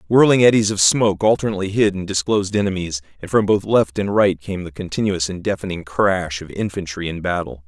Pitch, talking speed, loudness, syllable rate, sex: 95 Hz, 195 wpm, -19 LUFS, 5.9 syllables/s, male